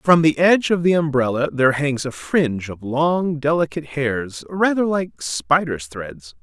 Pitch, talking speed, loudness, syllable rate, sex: 145 Hz, 170 wpm, -19 LUFS, 4.5 syllables/s, male